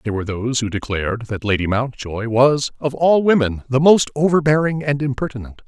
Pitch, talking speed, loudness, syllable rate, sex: 130 Hz, 180 wpm, -18 LUFS, 5.8 syllables/s, male